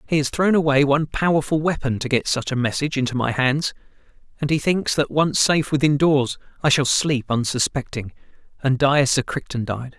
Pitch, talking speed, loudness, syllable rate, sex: 140 Hz, 185 wpm, -20 LUFS, 5.5 syllables/s, male